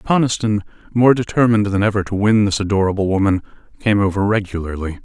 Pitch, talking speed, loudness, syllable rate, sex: 105 Hz, 155 wpm, -17 LUFS, 6.3 syllables/s, male